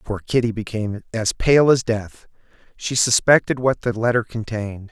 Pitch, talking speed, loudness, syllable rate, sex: 115 Hz, 160 wpm, -20 LUFS, 4.9 syllables/s, male